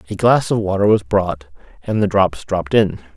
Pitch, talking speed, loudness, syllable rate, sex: 105 Hz, 210 wpm, -17 LUFS, 5.2 syllables/s, male